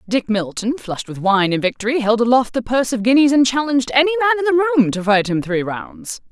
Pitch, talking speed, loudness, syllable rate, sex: 245 Hz, 240 wpm, -17 LUFS, 6.4 syllables/s, female